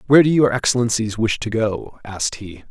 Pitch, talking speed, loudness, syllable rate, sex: 115 Hz, 200 wpm, -18 LUFS, 5.7 syllables/s, male